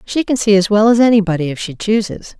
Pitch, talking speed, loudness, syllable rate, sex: 205 Hz, 275 wpm, -14 LUFS, 6.1 syllables/s, female